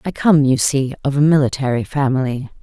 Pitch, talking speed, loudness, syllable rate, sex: 140 Hz, 185 wpm, -16 LUFS, 5.5 syllables/s, female